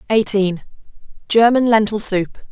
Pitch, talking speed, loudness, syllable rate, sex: 210 Hz, 70 wpm, -16 LUFS, 4.2 syllables/s, female